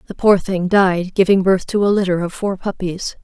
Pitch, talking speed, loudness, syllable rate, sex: 190 Hz, 225 wpm, -17 LUFS, 5.0 syllables/s, female